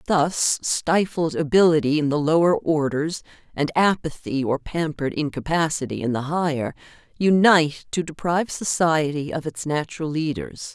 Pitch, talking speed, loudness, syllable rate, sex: 155 Hz, 130 wpm, -22 LUFS, 4.8 syllables/s, female